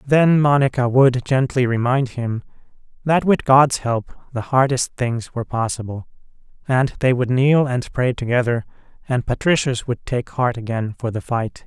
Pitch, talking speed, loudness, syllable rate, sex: 125 Hz, 160 wpm, -19 LUFS, 4.6 syllables/s, male